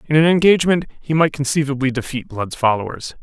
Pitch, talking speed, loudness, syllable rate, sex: 145 Hz, 165 wpm, -18 LUFS, 6.3 syllables/s, male